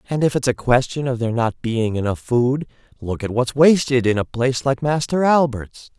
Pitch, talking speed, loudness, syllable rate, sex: 125 Hz, 210 wpm, -19 LUFS, 5.2 syllables/s, male